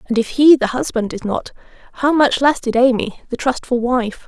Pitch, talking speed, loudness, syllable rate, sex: 250 Hz, 210 wpm, -16 LUFS, 5.0 syllables/s, female